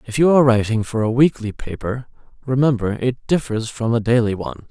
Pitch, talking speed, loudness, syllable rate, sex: 120 Hz, 190 wpm, -19 LUFS, 5.9 syllables/s, male